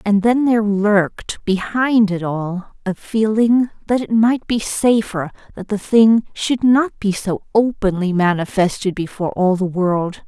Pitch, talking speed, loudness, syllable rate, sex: 205 Hz, 160 wpm, -17 LUFS, 4.1 syllables/s, female